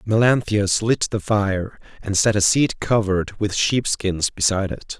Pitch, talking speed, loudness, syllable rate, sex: 105 Hz, 170 wpm, -20 LUFS, 4.3 syllables/s, male